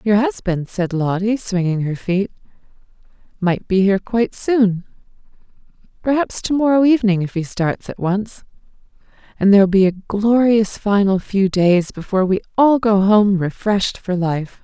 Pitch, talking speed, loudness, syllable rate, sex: 200 Hz, 150 wpm, -17 LUFS, 4.7 syllables/s, female